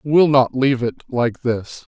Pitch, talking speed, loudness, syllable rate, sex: 130 Hz, 215 wpm, -18 LUFS, 5.0 syllables/s, male